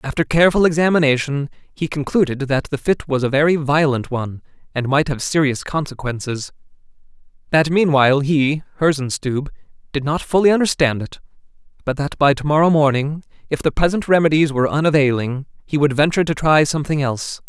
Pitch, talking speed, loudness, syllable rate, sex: 145 Hz, 160 wpm, -18 LUFS, 5.9 syllables/s, male